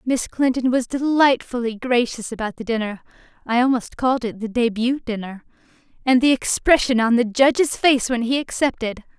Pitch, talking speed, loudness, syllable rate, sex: 245 Hz, 150 wpm, -20 LUFS, 5.2 syllables/s, female